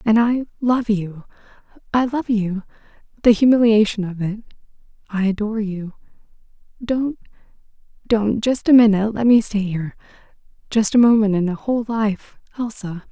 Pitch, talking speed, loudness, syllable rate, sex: 215 Hz, 115 wpm, -19 LUFS, 5.1 syllables/s, female